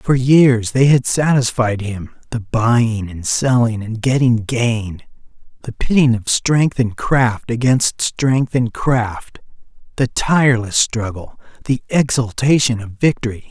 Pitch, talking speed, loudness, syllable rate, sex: 120 Hz, 135 wpm, -16 LUFS, 3.7 syllables/s, male